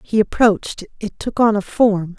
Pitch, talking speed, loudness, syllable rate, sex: 215 Hz, 195 wpm, -17 LUFS, 4.6 syllables/s, female